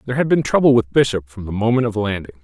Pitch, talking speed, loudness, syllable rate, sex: 110 Hz, 270 wpm, -18 LUFS, 7.2 syllables/s, male